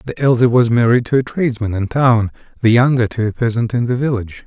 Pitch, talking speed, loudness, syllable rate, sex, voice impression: 120 Hz, 230 wpm, -16 LUFS, 6.3 syllables/s, male, very masculine, very adult-like, slightly thick, slightly muffled, cool, slightly calm, slightly friendly, slightly kind